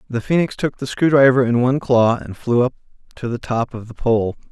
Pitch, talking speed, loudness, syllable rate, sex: 125 Hz, 240 wpm, -18 LUFS, 5.6 syllables/s, male